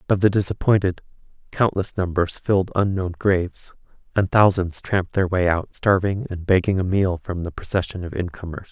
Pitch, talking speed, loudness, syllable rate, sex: 95 Hz, 165 wpm, -21 LUFS, 5.3 syllables/s, male